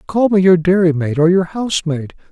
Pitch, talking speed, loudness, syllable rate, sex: 175 Hz, 180 wpm, -14 LUFS, 5.4 syllables/s, male